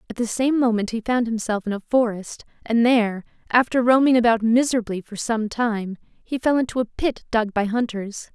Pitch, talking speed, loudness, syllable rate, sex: 230 Hz, 195 wpm, -21 LUFS, 5.2 syllables/s, female